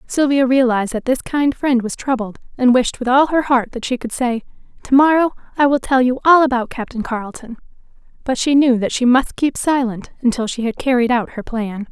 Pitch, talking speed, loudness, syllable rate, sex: 250 Hz, 215 wpm, -17 LUFS, 5.4 syllables/s, female